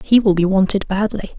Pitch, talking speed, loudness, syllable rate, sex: 200 Hz, 215 wpm, -17 LUFS, 5.4 syllables/s, female